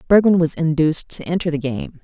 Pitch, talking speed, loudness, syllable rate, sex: 160 Hz, 205 wpm, -18 LUFS, 6.0 syllables/s, female